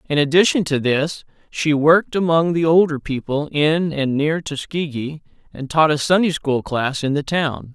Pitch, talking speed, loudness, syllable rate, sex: 155 Hz, 180 wpm, -18 LUFS, 4.6 syllables/s, male